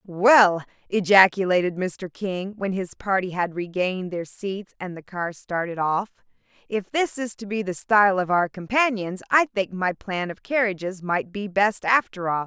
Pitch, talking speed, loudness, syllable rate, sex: 190 Hz, 180 wpm, -23 LUFS, 4.5 syllables/s, female